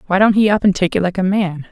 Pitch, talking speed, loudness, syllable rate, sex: 190 Hz, 350 wpm, -15 LUFS, 6.6 syllables/s, female